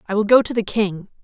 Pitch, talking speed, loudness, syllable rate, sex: 210 Hz, 290 wpm, -18 LUFS, 6.1 syllables/s, female